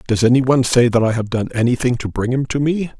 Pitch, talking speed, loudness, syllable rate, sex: 125 Hz, 280 wpm, -17 LUFS, 6.6 syllables/s, male